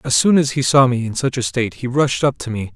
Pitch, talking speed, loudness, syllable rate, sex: 125 Hz, 325 wpm, -17 LUFS, 6.0 syllables/s, male